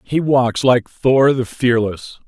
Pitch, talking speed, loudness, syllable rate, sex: 125 Hz, 160 wpm, -16 LUFS, 3.3 syllables/s, male